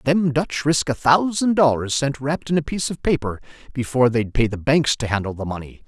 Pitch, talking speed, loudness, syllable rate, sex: 135 Hz, 225 wpm, -20 LUFS, 5.7 syllables/s, male